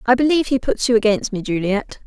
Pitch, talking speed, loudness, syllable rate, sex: 230 Hz, 230 wpm, -18 LUFS, 6.3 syllables/s, female